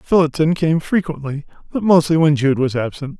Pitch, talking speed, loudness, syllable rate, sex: 155 Hz, 170 wpm, -17 LUFS, 5.2 syllables/s, male